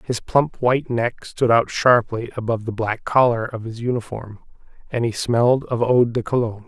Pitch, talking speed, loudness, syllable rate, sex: 115 Hz, 190 wpm, -20 LUFS, 5.3 syllables/s, male